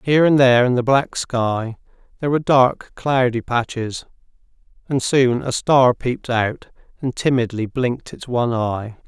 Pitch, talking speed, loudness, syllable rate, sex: 125 Hz, 160 wpm, -19 LUFS, 4.8 syllables/s, male